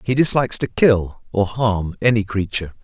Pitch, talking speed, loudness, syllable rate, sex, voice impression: 105 Hz, 170 wpm, -19 LUFS, 5.0 syllables/s, male, masculine, adult-like, thick, tensed, powerful, clear, cool, intellectual, slightly mature, wild, lively, slightly modest